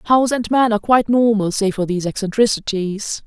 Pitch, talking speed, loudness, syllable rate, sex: 215 Hz, 185 wpm, -17 LUFS, 5.9 syllables/s, female